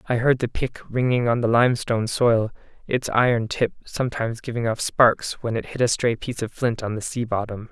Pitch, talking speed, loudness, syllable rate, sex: 115 Hz, 220 wpm, -22 LUFS, 5.5 syllables/s, male